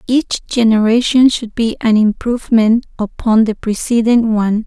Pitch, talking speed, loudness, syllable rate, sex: 225 Hz, 130 wpm, -14 LUFS, 4.6 syllables/s, female